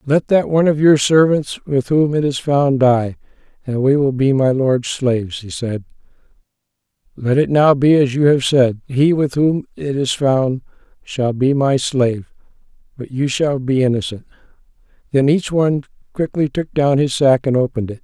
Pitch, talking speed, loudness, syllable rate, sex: 135 Hz, 185 wpm, -16 LUFS, 4.7 syllables/s, male